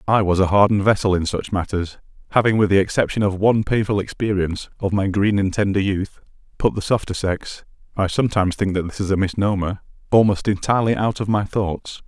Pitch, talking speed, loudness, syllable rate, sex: 100 Hz, 200 wpm, -20 LUFS, 5.1 syllables/s, male